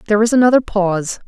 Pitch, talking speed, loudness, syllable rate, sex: 215 Hz, 190 wpm, -15 LUFS, 7.7 syllables/s, female